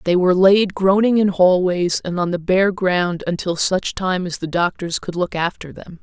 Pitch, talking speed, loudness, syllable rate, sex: 180 Hz, 210 wpm, -18 LUFS, 4.6 syllables/s, female